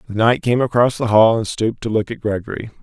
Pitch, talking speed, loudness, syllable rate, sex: 110 Hz, 255 wpm, -17 LUFS, 6.3 syllables/s, male